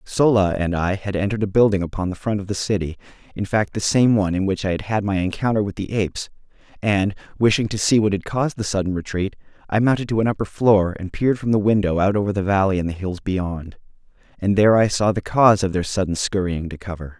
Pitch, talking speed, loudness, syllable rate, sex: 100 Hz, 240 wpm, -20 LUFS, 6.2 syllables/s, male